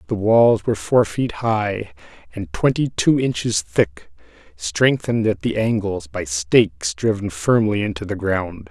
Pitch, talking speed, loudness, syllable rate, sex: 110 Hz, 150 wpm, -19 LUFS, 4.2 syllables/s, male